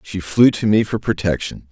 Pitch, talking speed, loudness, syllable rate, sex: 100 Hz, 210 wpm, -17 LUFS, 5.0 syllables/s, male